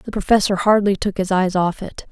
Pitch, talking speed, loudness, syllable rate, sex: 195 Hz, 225 wpm, -18 LUFS, 5.3 syllables/s, female